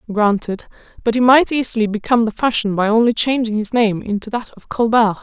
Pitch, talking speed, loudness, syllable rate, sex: 225 Hz, 195 wpm, -17 LUFS, 5.9 syllables/s, female